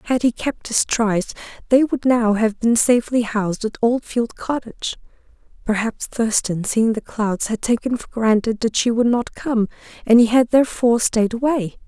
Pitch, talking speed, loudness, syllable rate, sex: 230 Hz, 180 wpm, -19 LUFS, 4.9 syllables/s, female